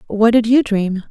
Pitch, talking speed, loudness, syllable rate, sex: 220 Hz, 215 wpm, -15 LUFS, 4.4 syllables/s, female